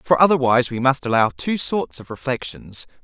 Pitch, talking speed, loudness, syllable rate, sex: 135 Hz, 180 wpm, -20 LUFS, 5.4 syllables/s, male